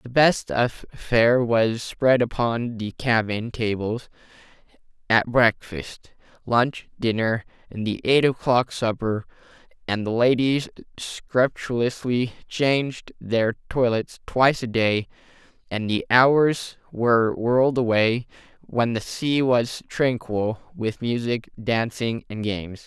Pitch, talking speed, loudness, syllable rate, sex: 120 Hz, 120 wpm, -23 LUFS, 3.6 syllables/s, male